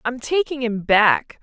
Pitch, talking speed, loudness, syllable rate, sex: 240 Hz, 170 wpm, -19 LUFS, 3.8 syllables/s, female